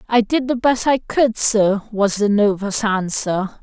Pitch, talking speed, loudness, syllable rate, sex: 220 Hz, 180 wpm, -17 LUFS, 3.8 syllables/s, female